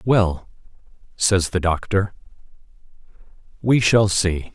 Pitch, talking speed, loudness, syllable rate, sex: 95 Hz, 90 wpm, -20 LUFS, 3.5 syllables/s, male